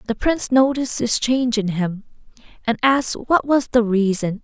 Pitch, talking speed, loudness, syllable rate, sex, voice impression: 235 Hz, 175 wpm, -19 LUFS, 5.3 syllables/s, female, feminine, adult-like, slightly relaxed, slightly powerful, bright, soft, halting, raspy, slightly calm, friendly, reassuring, slightly lively, kind